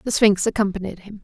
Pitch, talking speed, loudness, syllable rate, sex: 200 Hz, 195 wpm, -20 LUFS, 6.3 syllables/s, female